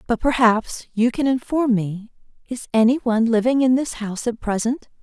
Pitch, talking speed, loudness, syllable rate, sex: 235 Hz, 165 wpm, -20 LUFS, 5.2 syllables/s, female